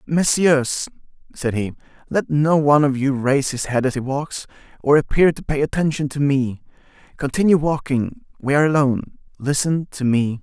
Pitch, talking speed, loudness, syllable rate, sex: 140 Hz, 165 wpm, -19 LUFS, 5.2 syllables/s, male